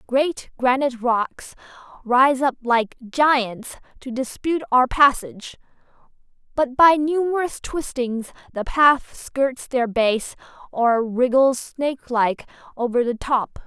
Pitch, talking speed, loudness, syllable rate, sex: 260 Hz, 115 wpm, -20 LUFS, 3.8 syllables/s, female